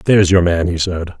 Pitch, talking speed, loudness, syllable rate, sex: 90 Hz, 250 wpm, -15 LUFS, 5.9 syllables/s, male